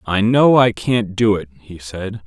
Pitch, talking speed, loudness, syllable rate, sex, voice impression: 105 Hz, 210 wpm, -16 LUFS, 4.0 syllables/s, male, masculine, adult-like, slightly thick, slightly refreshing, sincere, slightly elegant